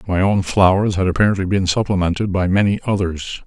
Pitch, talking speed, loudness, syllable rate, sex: 95 Hz, 175 wpm, -17 LUFS, 5.9 syllables/s, male